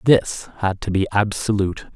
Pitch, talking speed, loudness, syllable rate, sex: 100 Hz, 155 wpm, -21 LUFS, 5.1 syllables/s, male